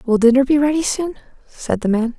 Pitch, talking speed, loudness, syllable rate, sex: 260 Hz, 220 wpm, -17 LUFS, 5.5 syllables/s, female